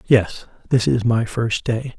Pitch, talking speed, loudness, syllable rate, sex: 115 Hz, 180 wpm, -20 LUFS, 3.8 syllables/s, male